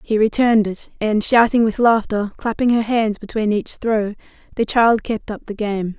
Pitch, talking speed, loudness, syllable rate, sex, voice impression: 220 Hz, 190 wpm, -18 LUFS, 4.7 syllables/s, female, feminine, slightly young, slightly relaxed, powerful, soft, raspy, slightly refreshing, friendly, slightly reassuring, elegant, lively, slightly modest